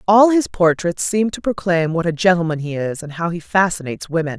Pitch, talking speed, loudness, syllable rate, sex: 175 Hz, 220 wpm, -18 LUFS, 5.7 syllables/s, female